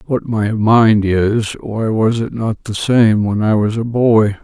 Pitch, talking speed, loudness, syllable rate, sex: 110 Hz, 205 wpm, -15 LUFS, 3.8 syllables/s, male